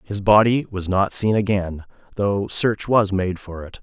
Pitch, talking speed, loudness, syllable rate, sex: 100 Hz, 190 wpm, -19 LUFS, 4.2 syllables/s, male